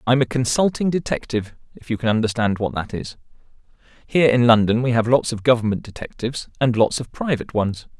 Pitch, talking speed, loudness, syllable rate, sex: 120 Hz, 190 wpm, -20 LUFS, 6.2 syllables/s, male